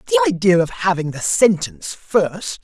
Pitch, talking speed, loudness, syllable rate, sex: 200 Hz, 160 wpm, -18 LUFS, 5.2 syllables/s, male